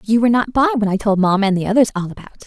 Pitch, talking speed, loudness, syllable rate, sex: 220 Hz, 340 wpm, -16 LUFS, 8.6 syllables/s, female